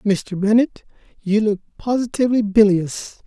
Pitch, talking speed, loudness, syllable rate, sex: 210 Hz, 110 wpm, -18 LUFS, 4.6 syllables/s, male